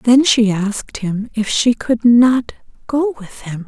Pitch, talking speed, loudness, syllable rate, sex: 230 Hz, 180 wpm, -15 LUFS, 3.7 syllables/s, female